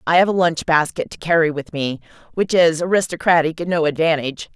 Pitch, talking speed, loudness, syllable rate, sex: 165 Hz, 200 wpm, -18 LUFS, 6.0 syllables/s, female